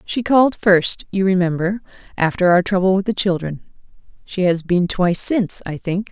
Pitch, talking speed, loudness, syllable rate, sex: 185 Hz, 175 wpm, -18 LUFS, 5.2 syllables/s, female